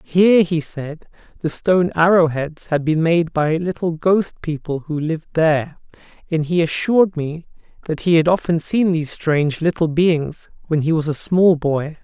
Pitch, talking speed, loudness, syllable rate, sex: 165 Hz, 180 wpm, -18 LUFS, 4.7 syllables/s, male